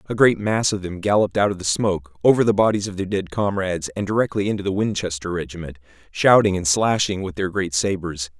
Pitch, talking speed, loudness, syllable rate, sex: 95 Hz, 215 wpm, -20 LUFS, 6.0 syllables/s, male